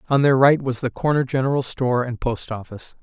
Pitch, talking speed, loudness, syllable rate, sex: 130 Hz, 220 wpm, -20 LUFS, 6.1 syllables/s, male